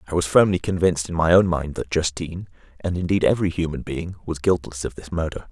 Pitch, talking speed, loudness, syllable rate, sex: 85 Hz, 220 wpm, -22 LUFS, 6.4 syllables/s, male